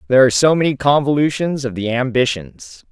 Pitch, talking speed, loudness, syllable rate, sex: 125 Hz, 165 wpm, -16 LUFS, 5.6 syllables/s, male